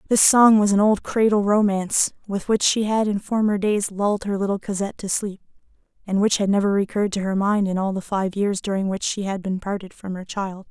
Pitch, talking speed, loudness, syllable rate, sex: 200 Hz, 235 wpm, -21 LUFS, 5.7 syllables/s, female